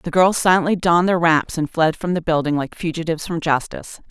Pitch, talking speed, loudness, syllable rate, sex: 165 Hz, 220 wpm, -18 LUFS, 6.0 syllables/s, female